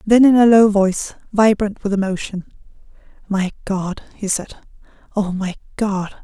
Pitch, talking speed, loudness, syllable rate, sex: 200 Hz, 145 wpm, -18 LUFS, 4.6 syllables/s, female